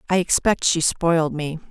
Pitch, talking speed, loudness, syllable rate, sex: 165 Hz, 175 wpm, -20 LUFS, 4.9 syllables/s, female